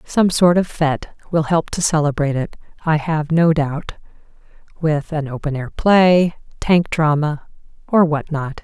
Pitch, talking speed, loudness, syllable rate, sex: 155 Hz, 160 wpm, -18 LUFS, 4.4 syllables/s, female